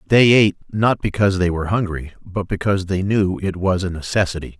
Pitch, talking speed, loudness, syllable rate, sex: 95 Hz, 195 wpm, -19 LUFS, 6.0 syllables/s, male